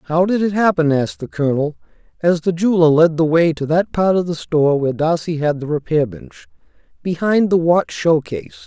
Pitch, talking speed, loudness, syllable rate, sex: 165 Hz, 200 wpm, -17 LUFS, 5.6 syllables/s, male